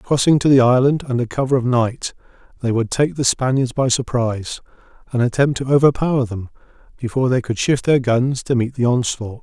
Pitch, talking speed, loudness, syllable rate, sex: 125 Hz, 190 wpm, -18 LUFS, 5.6 syllables/s, male